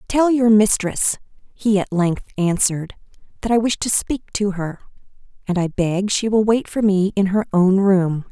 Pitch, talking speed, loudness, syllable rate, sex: 200 Hz, 190 wpm, -18 LUFS, 4.4 syllables/s, female